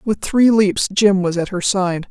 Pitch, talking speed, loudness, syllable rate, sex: 195 Hz, 230 wpm, -16 LUFS, 4.1 syllables/s, female